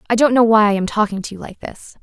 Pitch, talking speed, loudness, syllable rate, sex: 215 Hz, 325 wpm, -15 LUFS, 6.7 syllables/s, female